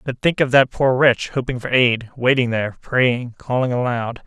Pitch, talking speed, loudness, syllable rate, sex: 125 Hz, 195 wpm, -18 LUFS, 4.7 syllables/s, male